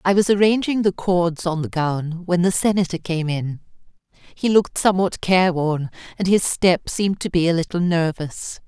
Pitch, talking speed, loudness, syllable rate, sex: 180 Hz, 180 wpm, -20 LUFS, 5.0 syllables/s, female